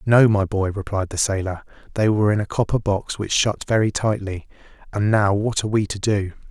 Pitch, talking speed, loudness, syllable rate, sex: 100 Hz, 210 wpm, -21 LUFS, 5.5 syllables/s, male